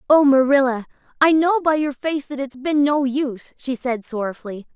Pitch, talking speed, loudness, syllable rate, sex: 275 Hz, 190 wpm, -19 LUFS, 5.1 syllables/s, female